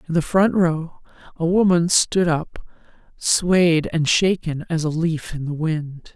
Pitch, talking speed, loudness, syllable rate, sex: 165 Hz, 165 wpm, -20 LUFS, 3.7 syllables/s, female